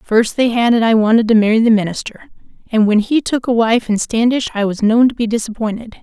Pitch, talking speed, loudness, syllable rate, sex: 225 Hz, 240 wpm, -14 LUFS, 5.9 syllables/s, female